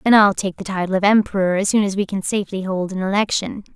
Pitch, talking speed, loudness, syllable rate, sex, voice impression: 195 Hz, 255 wpm, -19 LUFS, 6.4 syllables/s, female, feminine, slightly young, slightly thin, tensed, bright, soft, slightly intellectual, slightly refreshing, friendly, unique, elegant, lively, slightly intense